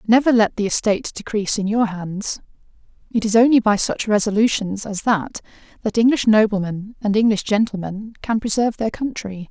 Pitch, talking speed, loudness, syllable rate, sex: 215 Hz, 165 wpm, -19 LUFS, 5.4 syllables/s, female